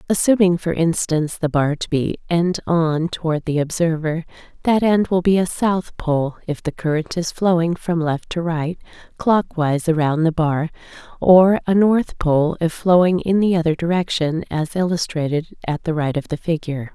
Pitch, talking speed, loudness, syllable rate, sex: 165 Hz, 175 wpm, -19 LUFS, 4.7 syllables/s, female